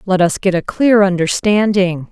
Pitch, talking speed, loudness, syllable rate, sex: 190 Hz, 170 wpm, -14 LUFS, 4.5 syllables/s, female